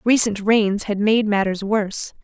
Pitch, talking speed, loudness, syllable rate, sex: 210 Hz, 160 wpm, -19 LUFS, 4.4 syllables/s, female